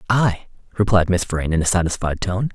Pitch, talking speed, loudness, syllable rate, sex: 95 Hz, 190 wpm, -20 LUFS, 5.3 syllables/s, male